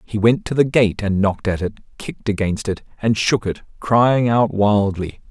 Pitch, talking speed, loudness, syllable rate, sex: 105 Hz, 205 wpm, -18 LUFS, 4.8 syllables/s, male